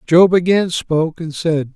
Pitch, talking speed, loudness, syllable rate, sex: 165 Hz, 170 wpm, -16 LUFS, 4.3 syllables/s, male